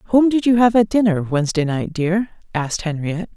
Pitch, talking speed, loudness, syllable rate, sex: 190 Hz, 195 wpm, -18 LUFS, 5.6 syllables/s, female